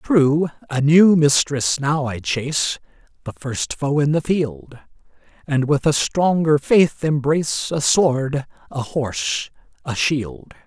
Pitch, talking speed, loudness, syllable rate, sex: 145 Hz, 140 wpm, -19 LUFS, 3.6 syllables/s, male